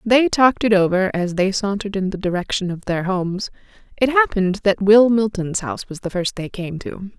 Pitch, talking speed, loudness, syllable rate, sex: 200 Hz, 210 wpm, -19 LUFS, 5.5 syllables/s, female